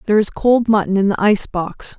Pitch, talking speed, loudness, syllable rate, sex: 205 Hz, 240 wpm, -16 LUFS, 6.1 syllables/s, female